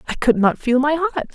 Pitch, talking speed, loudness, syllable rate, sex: 280 Hz, 265 wpm, -18 LUFS, 6.7 syllables/s, female